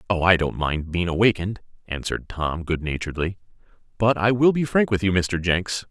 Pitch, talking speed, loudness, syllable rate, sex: 95 Hz, 195 wpm, -22 LUFS, 5.5 syllables/s, male